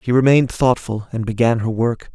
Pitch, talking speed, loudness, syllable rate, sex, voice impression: 120 Hz, 195 wpm, -18 LUFS, 5.6 syllables/s, male, masculine, adult-like, slightly thick, slightly powerful, slightly fluent, unique, slightly lively